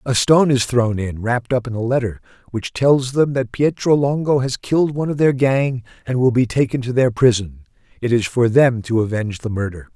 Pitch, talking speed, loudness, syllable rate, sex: 125 Hz, 225 wpm, -18 LUFS, 5.5 syllables/s, male